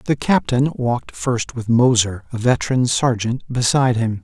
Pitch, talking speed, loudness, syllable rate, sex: 120 Hz, 155 wpm, -18 LUFS, 4.7 syllables/s, male